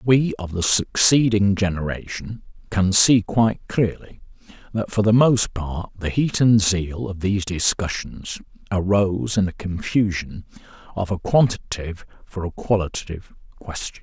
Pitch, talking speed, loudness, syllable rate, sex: 100 Hz, 135 wpm, -21 LUFS, 4.6 syllables/s, male